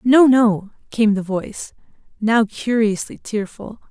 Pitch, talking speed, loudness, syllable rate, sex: 220 Hz, 125 wpm, -18 LUFS, 3.9 syllables/s, female